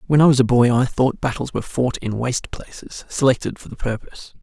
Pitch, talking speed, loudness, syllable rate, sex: 125 Hz, 230 wpm, -20 LUFS, 6.0 syllables/s, male